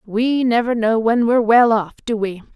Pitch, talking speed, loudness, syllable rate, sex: 225 Hz, 210 wpm, -17 LUFS, 5.0 syllables/s, female